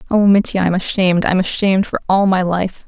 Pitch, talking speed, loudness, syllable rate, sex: 190 Hz, 210 wpm, -15 LUFS, 5.8 syllables/s, female